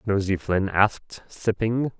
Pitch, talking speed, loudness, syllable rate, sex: 105 Hz, 120 wpm, -24 LUFS, 3.9 syllables/s, male